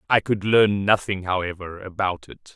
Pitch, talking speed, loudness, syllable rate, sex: 95 Hz, 165 wpm, -21 LUFS, 4.7 syllables/s, male